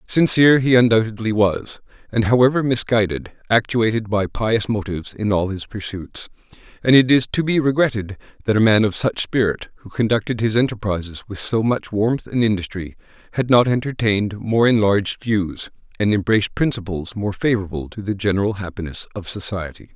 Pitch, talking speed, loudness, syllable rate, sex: 110 Hz, 160 wpm, -19 LUFS, 5.5 syllables/s, male